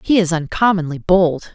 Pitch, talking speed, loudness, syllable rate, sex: 175 Hz, 155 wpm, -16 LUFS, 4.8 syllables/s, female